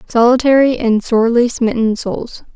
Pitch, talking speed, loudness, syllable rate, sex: 235 Hz, 115 wpm, -13 LUFS, 4.8 syllables/s, female